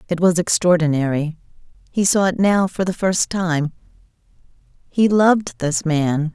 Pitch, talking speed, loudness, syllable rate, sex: 170 Hz, 125 wpm, -18 LUFS, 4.4 syllables/s, female